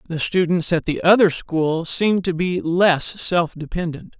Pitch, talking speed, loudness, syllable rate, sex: 175 Hz, 170 wpm, -19 LUFS, 4.3 syllables/s, male